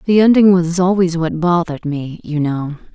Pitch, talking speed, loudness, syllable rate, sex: 170 Hz, 185 wpm, -15 LUFS, 4.9 syllables/s, female